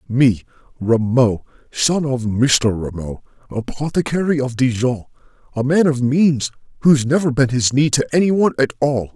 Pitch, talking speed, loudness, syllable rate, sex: 130 Hz, 145 wpm, -17 LUFS, 4.6 syllables/s, male